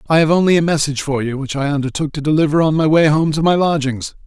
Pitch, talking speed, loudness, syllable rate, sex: 150 Hz, 265 wpm, -16 LUFS, 6.8 syllables/s, male